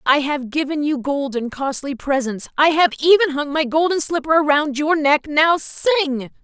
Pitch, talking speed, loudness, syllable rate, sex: 295 Hz, 175 wpm, -18 LUFS, 5.0 syllables/s, female